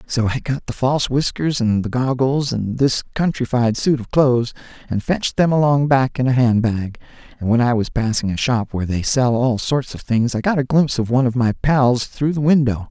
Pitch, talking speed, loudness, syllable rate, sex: 125 Hz, 230 wpm, -18 LUFS, 5.3 syllables/s, male